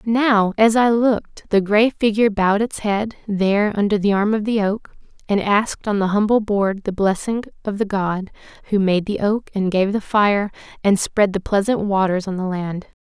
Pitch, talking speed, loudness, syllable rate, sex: 205 Hz, 205 wpm, -19 LUFS, 4.9 syllables/s, female